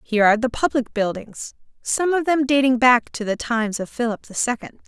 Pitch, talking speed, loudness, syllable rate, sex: 245 Hz, 210 wpm, -20 LUFS, 5.6 syllables/s, female